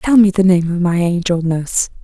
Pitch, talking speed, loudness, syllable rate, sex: 180 Hz, 235 wpm, -15 LUFS, 5.3 syllables/s, female